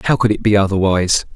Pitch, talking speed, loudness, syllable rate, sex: 100 Hz, 220 wpm, -15 LUFS, 7.1 syllables/s, male